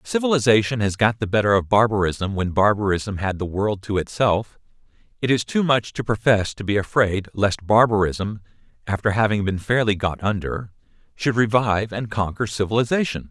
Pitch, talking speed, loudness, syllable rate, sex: 105 Hz, 165 wpm, -21 LUFS, 5.3 syllables/s, male